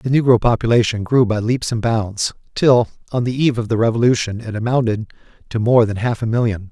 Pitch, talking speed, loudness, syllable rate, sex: 115 Hz, 205 wpm, -17 LUFS, 6.1 syllables/s, male